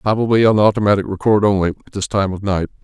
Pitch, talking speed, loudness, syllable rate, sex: 100 Hz, 210 wpm, -16 LUFS, 6.9 syllables/s, male